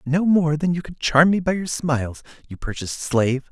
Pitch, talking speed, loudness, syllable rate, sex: 150 Hz, 220 wpm, -21 LUFS, 5.5 syllables/s, male